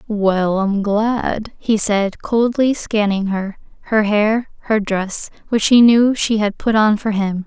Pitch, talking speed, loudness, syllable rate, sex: 210 Hz, 170 wpm, -17 LUFS, 3.5 syllables/s, female